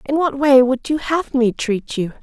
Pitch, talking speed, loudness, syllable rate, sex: 265 Hz, 240 wpm, -17 LUFS, 4.4 syllables/s, female